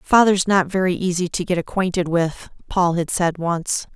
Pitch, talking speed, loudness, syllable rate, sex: 180 Hz, 180 wpm, -20 LUFS, 4.6 syllables/s, female